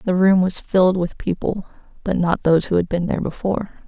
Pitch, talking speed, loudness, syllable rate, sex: 180 Hz, 215 wpm, -19 LUFS, 6.0 syllables/s, female